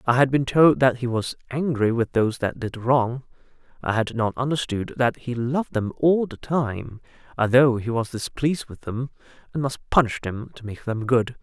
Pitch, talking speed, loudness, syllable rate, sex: 125 Hz, 200 wpm, -23 LUFS, 4.9 syllables/s, male